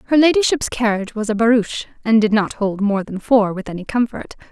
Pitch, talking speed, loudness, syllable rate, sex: 220 Hz, 215 wpm, -18 LUFS, 5.8 syllables/s, female